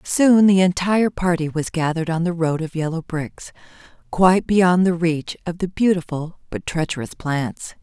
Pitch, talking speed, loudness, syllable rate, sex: 170 Hz, 170 wpm, -20 LUFS, 4.8 syllables/s, female